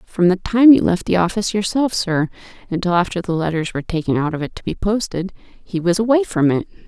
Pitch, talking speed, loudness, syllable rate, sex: 185 Hz, 225 wpm, -18 LUFS, 5.9 syllables/s, female